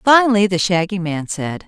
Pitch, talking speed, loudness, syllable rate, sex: 190 Hz, 180 wpm, -17 LUFS, 5.1 syllables/s, female